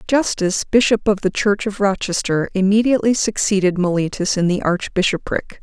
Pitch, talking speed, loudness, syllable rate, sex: 200 Hz, 140 wpm, -18 LUFS, 5.1 syllables/s, female